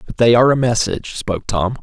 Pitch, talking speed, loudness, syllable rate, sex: 115 Hz, 230 wpm, -16 LUFS, 6.7 syllables/s, male